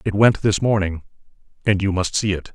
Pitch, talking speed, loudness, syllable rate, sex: 100 Hz, 210 wpm, -20 LUFS, 5.4 syllables/s, male